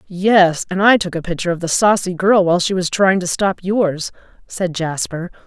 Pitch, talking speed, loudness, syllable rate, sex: 180 Hz, 210 wpm, -16 LUFS, 5.0 syllables/s, female